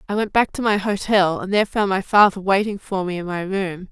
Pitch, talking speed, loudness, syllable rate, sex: 195 Hz, 260 wpm, -19 LUFS, 5.6 syllables/s, female